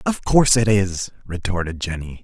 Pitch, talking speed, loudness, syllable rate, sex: 100 Hz, 160 wpm, -20 LUFS, 5.1 syllables/s, male